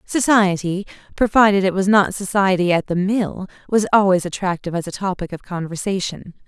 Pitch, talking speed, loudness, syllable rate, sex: 190 Hz, 140 wpm, -19 LUFS, 5.4 syllables/s, female